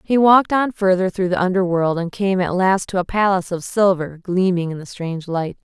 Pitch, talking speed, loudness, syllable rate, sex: 185 Hz, 220 wpm, -18 LUFS, 5.5 syllables/s, female